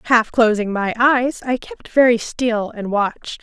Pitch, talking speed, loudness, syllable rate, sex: 230 Hz, 175 wpm, -18 LUFS, 4.1 syllables/s, female